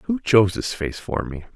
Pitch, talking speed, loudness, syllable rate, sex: 105 Hz, 230 wpm, -21 LUFS, 5.0 syllables/s, male